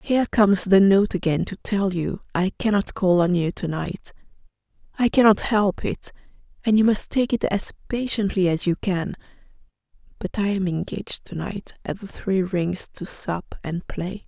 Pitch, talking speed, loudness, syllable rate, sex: 190 Hz, 180 wpm, -23 LUFS, 4.7 syllables/s, female